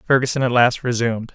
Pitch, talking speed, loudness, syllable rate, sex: 120 Hz, 180 wpm, -18 LUFS, 6.6 syllables/s, male